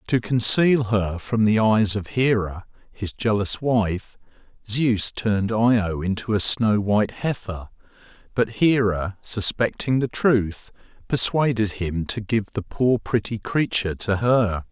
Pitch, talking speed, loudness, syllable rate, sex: 110 Hz, 145 wpm, -22 LUFS, 3.9 syllables/s, male